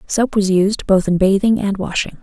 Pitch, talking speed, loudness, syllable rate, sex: 200 Hz, 215 wpm, -16 LUFS, 4.8 syllables/s, female